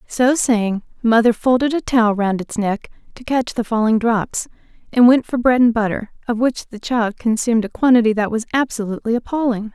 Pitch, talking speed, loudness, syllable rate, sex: 230 Hz, 190 wpm, -18 LUFS, 5.4 syllables/s, female